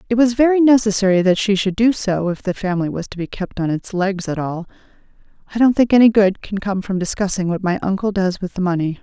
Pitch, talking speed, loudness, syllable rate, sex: 200 Hz, 245 wpm, -18 LUFS, 6.1 syllables/s, female